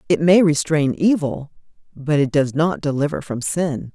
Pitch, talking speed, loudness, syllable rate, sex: 155 Hz, 165 wpm, -19 LUFS, 4.5 syllables/s, female